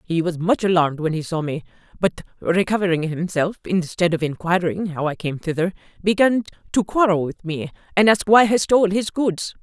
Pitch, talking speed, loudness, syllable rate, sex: 180 Hz, 185 wpm, -20 LUFS, 5.5 syllables/s, female